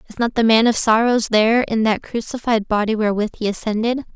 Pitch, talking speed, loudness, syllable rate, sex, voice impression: 225 Hz, 200 wpm, -18 LUFS, 6.2 syllables/s, female, very feminine, slightly young, slightly adult-like, very thin, tensed, powerful, very bright, hard, very clear, very fluent, very cute, slightly intellectual, very refreshing, sincere, slightly calm, very friendly, very reassuring, slightly unique, elegant, sweet, very lively, intense, slightly sharp